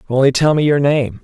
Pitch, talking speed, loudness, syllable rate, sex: 140 Hz, 245 wpm, -14 LUFS, 5.8 syllables/s, male